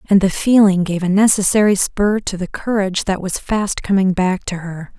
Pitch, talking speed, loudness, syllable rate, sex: 195 Hz, 205 wpm, -16 LUFS, 4.9 syllables/s, female